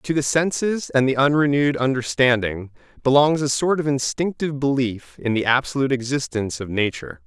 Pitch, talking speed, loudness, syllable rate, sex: 135 Hz, 155 wpm, -20 LUFS, 5.7 syllables/s, male